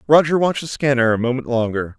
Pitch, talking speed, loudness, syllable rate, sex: 135 Hz, 210 wpm, -18 LUFS, 6.6 syllables/s, male